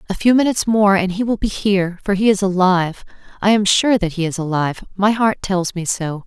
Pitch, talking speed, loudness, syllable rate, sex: 195 Hz, 240 wpm, -17 LUFS, 5.8 syllables/s, female